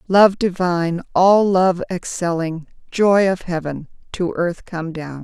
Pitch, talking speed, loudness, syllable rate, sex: 175 Hz, 140 wpm, -18 LUFS, 3.8 syllables/s, female